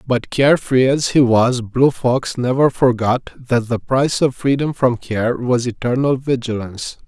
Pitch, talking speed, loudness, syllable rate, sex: 125 Hz, 170 wpm, -17 LUFS, 4.3 syllables/s, male